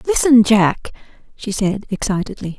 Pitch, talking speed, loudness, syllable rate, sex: 210 Hz, 115 wpm, -16 LUFS, 4.6 syllables/s, female